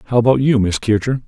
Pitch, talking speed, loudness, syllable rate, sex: 120 Hz, 235 wpm, -16 LUFS, 5.8 syllables/s, male